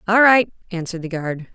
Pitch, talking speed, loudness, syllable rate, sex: 190 Hz, 195 wpm, -19 LUFS, 5.8 syllables/s, female